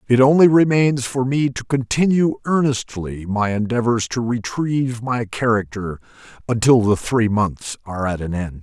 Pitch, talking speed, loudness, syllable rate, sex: 120 Hz, 145 wpm, -19 LUFS, 4.6 syllables/s, male